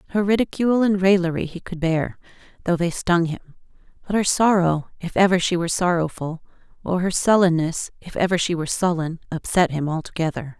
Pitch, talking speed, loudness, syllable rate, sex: 175 Hz, 170 wpm, -21 LUFS, 5.8 syllables/s, female